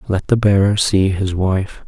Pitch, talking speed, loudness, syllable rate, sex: 100 Hz, 190 wpm, -16 LUFS, 4.1 syllables/s, male